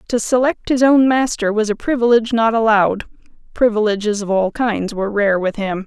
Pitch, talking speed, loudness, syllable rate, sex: 220 Hz, 185 wpm, -16 LUFS, 5.5 syllables/s, female